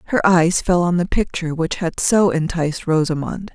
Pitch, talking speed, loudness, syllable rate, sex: 170 Hz, 185 wpm, -18 LUFS, 5.2 syllables/s, female